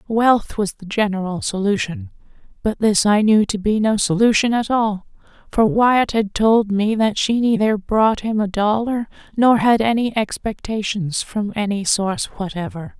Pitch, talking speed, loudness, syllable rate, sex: 210 Hz, 155 wpm, -18 LUFS, 4.4 syllables/s, female